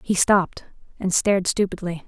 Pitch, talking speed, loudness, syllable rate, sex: 190 Hz, 145 wpm, -21 LUFS, 5.3 syllables/s, female